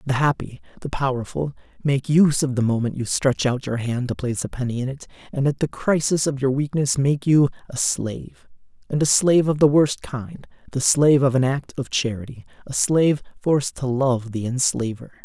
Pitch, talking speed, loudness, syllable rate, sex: 135 Hz, 200 wpm, -21 LUFS, 5.4 syllables/s, male